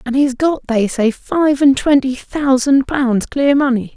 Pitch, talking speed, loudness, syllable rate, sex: 265 Hz, 195 wpm, -15 LUFS, 4.2 syllables/s, female